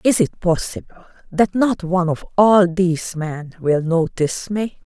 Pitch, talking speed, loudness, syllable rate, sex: 180 Hz, 160 wpm, -19 LUFS, 4.4 syllables/s, female